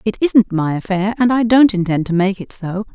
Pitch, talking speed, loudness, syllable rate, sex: 200 Hz, 245 wpm, -16 LUFS, 5.2 syllables/s, female